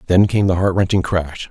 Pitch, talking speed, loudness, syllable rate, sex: 90 Hz, 240 wpm, -17 LUFS, 5.3 syllables/s, male